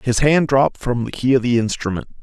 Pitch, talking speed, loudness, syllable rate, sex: 125 Hz, 245 wpm, -18 LUFS, 5.9 syllables/s, male